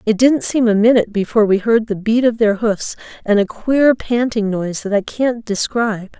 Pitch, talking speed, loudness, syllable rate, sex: 220 Hz, 215 wpm, -16 LUFS, 5.2 syllables/s, female